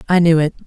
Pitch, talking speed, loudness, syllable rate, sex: 165 Hz, 270 wpm, -14 LUFS, 7.7 syllables/s, female